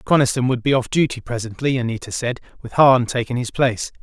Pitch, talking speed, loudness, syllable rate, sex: 125 Hz, 195 wpm, -19 LUFS, 6.1 syllables/s, male